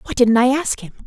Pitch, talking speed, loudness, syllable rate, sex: 245 Hz, 280 wpm, -17 LUFS, 5.8 syllables/s, female